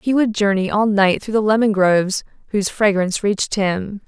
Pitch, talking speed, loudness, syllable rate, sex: 205 Hz, 190 wpm, -18 LUFS, 5.5 syllables/s, female